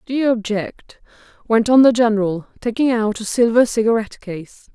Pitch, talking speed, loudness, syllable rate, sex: 225 Hz, 165 wpm, -17 LUFS, 5.2 syllables/s, female